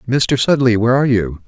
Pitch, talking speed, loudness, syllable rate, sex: 120 Hz, 205 wpm, -15 LUFS, 6.4 syllables/s, male